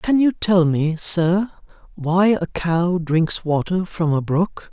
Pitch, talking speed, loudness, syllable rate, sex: 175 Hz, 165 wpm, -19 LUFS, 3.3 syllables/s, male